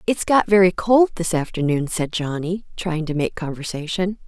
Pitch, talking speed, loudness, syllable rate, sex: 175 Hz, 170 wpm, -20 LUFS, 4.9 syllables/s, female